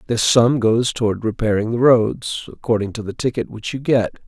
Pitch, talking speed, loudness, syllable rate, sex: 115 Hz, 195 wpm, -18 LUFS, 5.1 syllables/s, male